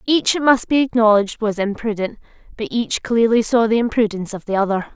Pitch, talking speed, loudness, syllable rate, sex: 225 Hz, 195 wpm, -18 LUFS, 5.9 syllables/s, female